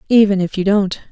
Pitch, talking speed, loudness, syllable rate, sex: 200 Hz, 215 wpm, -15 LUFS, 6.1 syllables/s, female